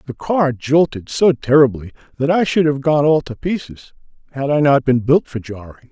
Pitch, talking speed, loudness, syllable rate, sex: 140 Hz, 205 wpm, -16 LUFS, 4.9 syllables/s, male